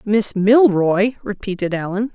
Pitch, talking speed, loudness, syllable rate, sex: 205 Hz, 110 wpm, -17 LUFS, 4.0 syllables/s, female